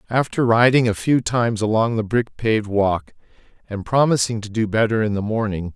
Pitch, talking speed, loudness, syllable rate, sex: 110 Hz, 190 wpm, -19 LUFS, 5.4 syllables/s, male